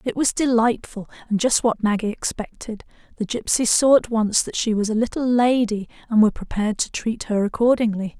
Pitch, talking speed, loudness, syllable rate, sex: 225 Hz, 190 wpm, -20 LUFS, 5.5 syllables/s, female